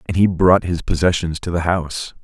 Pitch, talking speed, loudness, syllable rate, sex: 85 Hz, 215 wpm, -18 LUFS, 5.3 syllables/s, male